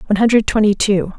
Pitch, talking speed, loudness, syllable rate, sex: 210 Hz, 205 wpm, -15 LUFS, 7.1 syllables/s, female